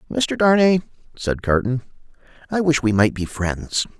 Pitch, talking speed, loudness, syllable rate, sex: 135 Hz, 150 wpm, -20 LUFS, 4.5 syllables/s, male